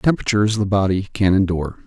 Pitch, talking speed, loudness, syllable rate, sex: 100 Hz, 160 wpm, -19 LUFS, 7.0 syllables/s, male